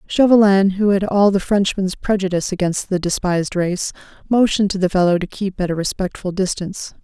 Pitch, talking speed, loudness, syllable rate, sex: 190 Hz, 180 wpm, -18 LUFS, 5.7 syllables/s, female